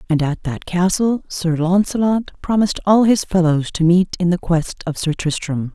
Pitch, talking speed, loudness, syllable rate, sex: 180 Hz, 190 wpm, -18 LUFS, 4.7 syllables/s, female